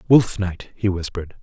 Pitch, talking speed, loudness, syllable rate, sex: 95 Hz, 170 wpm, -22 LUFS, 5.1 syllables/s, male